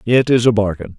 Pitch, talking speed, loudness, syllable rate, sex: 110 Hz, 245 wpm, -15 LUFS, 5.8 syllables/s, male